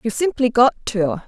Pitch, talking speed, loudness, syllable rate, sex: 235 Hz, 190 wpm, -18 LUFS, 5.7 syllables/s, female